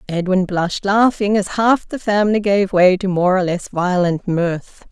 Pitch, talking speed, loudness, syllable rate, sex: 190 Hz, 185 wpm, -17 LUFS, 4.4 syllables/s, female